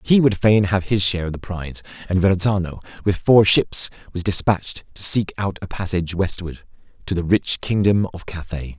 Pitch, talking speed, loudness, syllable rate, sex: 95 Hz, 190 wpm, -19 LUFS, 5.4 syllables/s, male